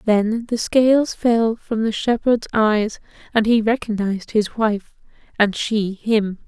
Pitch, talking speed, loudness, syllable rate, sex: 220 Hz, 150 wpm, -19 LUFS, 3.9 syllables/s, female